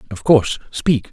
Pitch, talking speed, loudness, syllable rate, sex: 125 Hz, 160 wpm, -17 LUFS, 5.1 syllables/s, male